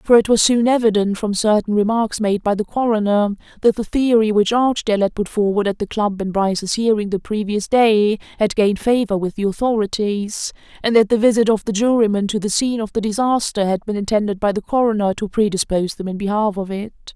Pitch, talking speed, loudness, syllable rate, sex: 210 Hz, 215 wpm, -18 LUFS, 5.8 syllables/s, female